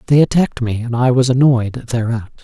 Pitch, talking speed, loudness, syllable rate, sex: 125 Hz, 195 wpm, -15 LUFS, 5.6 syllables/s, male